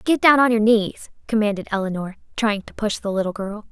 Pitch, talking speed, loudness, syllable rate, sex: 215 Hz, 210 wpm, -20 LUFS, 5.6 syllables/s, female